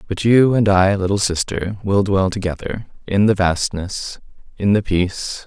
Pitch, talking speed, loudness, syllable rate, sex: 100 Hz, 145 wpm, -18 LUFS, 4.7 syllables/s, male